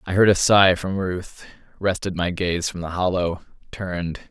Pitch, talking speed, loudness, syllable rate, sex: 90 Hz, 180 wpm, -21 LUFS, 4.6 syllables/s, male